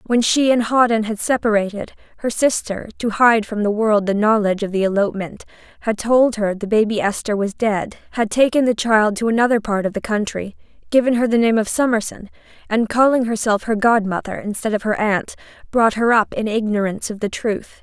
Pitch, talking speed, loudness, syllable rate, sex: 220 Hz, 200 wpm, -18 LUFS, 5.5 syllables/s, female